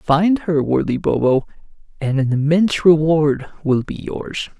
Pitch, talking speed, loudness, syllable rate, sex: 155 Hz, 145 wpm, -18 LUFS, 4.2 syllables/s, male